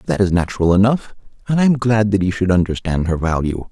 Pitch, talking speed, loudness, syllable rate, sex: 100 Hz, 225 wpm, -17 LUFS, 6.2 syllables/s, male